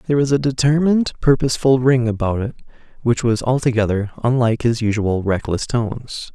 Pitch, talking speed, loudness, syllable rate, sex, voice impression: 120 Hz, 150 wpm, -18 LUFS, 5.8 syllables/s, male, masculine, adult-like, slightly dark, calm, slightly friendly, reassuring, slightly sweet, kind